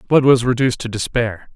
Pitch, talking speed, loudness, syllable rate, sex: 120 Hz, 195 wpm, -17 LUFS, 5.9 syllables/s, male